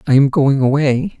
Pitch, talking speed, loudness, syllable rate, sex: 150 Hz, 200 wpm, -14 LUFS, 4.8 syllables/s, female